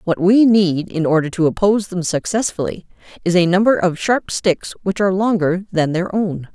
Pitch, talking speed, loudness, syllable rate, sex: 185 Hz, 195 wpm, -17 LUFS, 5.2 syllables/s, female